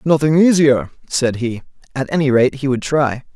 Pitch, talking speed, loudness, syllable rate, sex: 135 Hz, 180 wpm, -16 LUFS, 4.8 syllables/s, male